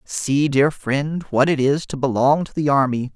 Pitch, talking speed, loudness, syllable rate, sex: 140 Hz, 210 wpm, -19 LUFS, 4.3 syllables/s, male